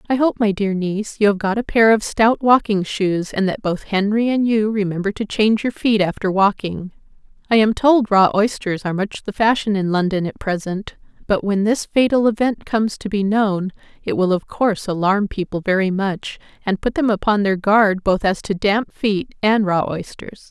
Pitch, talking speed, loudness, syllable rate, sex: 205 Hz, 210 wpm, -18 LUFS, 5.0 syllables/s, female